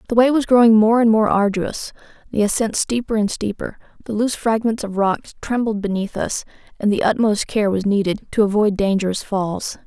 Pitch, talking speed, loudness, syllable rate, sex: 215 Hz, 190 wpm, -19 LUFS, 5.4 syllables/s, female